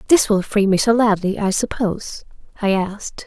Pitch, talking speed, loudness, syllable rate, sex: 205 Hz, 165 wpm, -18 LUFS, 4.9 syllables/s, female